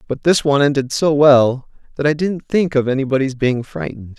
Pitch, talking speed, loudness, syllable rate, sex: 140 Hz, 200 wpm, -16 LUFS, 5.6 syllables/s, male